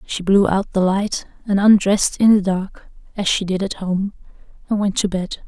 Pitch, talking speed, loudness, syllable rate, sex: 195 Hz, 210 wpm, -18 LUFS, 4.8 syllables/s, female